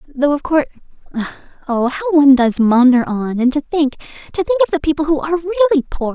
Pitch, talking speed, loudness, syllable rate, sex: 295 Hz, 195 wpm, -15 LUFS, 6.7 syllables/s, female